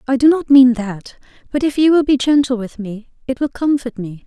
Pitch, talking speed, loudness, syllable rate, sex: 255 Hz, 240 wpm, -15 LUFS, 5.3 syllables/s, female